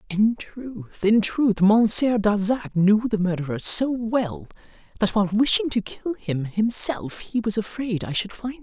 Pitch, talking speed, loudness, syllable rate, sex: 210 Hz, 160 wpm, -22 LUFS, 4.2 syllables/s, female